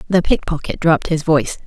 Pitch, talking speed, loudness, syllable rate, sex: 160 Hz, 215 wpm, -17 LUFS, 6.3 syllables/s, female